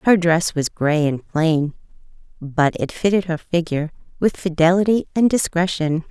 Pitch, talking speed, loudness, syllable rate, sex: 170 Hz, 145 wpm, -19 LUFS, 4.7 syllables/s, female